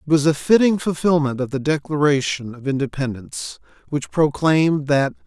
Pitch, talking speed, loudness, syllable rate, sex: 145 Hz, 150 wpm, -20 LUFS, 5.3 syllables/s, male